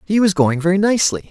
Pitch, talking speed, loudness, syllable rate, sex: 180 Hz, 230 wpm, -16 LUFS, 6.7 syllables/s, male